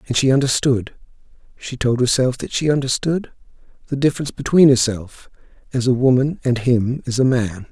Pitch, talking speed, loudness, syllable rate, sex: 130 Hz, 165 wpm, -18 LUFS, 5.5 syllables/s, male